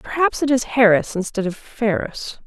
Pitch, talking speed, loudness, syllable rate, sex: 220 Hz, 170 wpm, -19 LUFS, 4.8 syllables/s, female